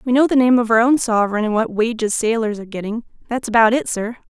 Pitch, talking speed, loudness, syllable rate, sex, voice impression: 230 Hz, 250 wpm, -17 LUFS, 6.5 syllables/s, female, feminine, adult-like, slightly clear, slightly refreshing, friendly, slightly kind